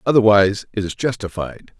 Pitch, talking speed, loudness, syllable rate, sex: 105 Hz, 135 wpm, -18 LUFS, 5.6 syllables/s, male